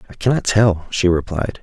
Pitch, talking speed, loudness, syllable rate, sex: 100 Hz, 185 wpm, -17 LUFS, 5.0 syllables/s, male